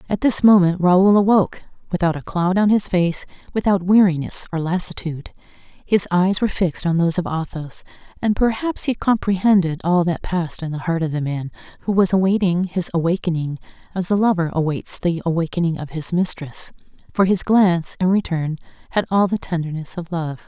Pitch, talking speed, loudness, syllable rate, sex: 180 Hz, 180 wpm, -19 LUFS, 5.5 syllables/s, female